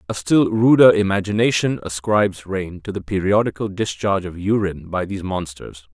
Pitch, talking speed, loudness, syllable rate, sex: 100 Hz, 150 wpm, -19 LUFS, 5.5 syllables/s, male